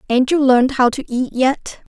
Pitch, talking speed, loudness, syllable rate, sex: 260 Hz, 215 wpm, -16 LUFS, 4.8 syllables/s, female